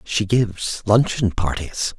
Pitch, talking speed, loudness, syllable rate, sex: 100 Hz, 120 wpm, -20 LUFS, 3.8 syllables/s, male